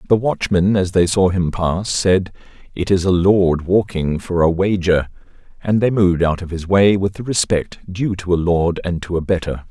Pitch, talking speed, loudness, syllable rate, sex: 90 Hz, 210 wpm, -17 LUFS, 4.7 syllables/s, male